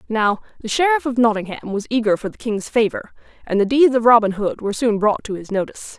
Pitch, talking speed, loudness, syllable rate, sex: 225 Hz, 230 wpm, -19 LUFS, 6.1 syllables/s, female